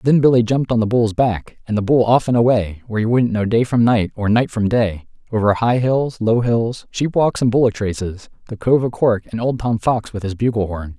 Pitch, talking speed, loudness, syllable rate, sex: 115 Hz, 250 wpm, -18 LUFS, 5.4 syllables/s, male